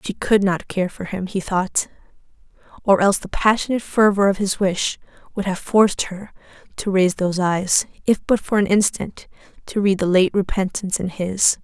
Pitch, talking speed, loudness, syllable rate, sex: 195 Hz, 185 wpm, -19 LUFS, 5.2 syllables/s, female